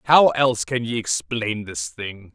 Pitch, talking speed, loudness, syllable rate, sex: 110 Hz, 180 wpm, -22 LUFS, 4.1 syllables/s, male